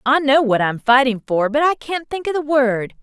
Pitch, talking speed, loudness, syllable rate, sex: 265 Hz, 260 wpm, -17 LUFS, 4.9 syllables/s, female